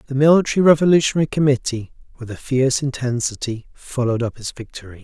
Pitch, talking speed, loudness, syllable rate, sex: 130 Hz, 145 wpm, -18 LUFS, 6.6 syllables/s, male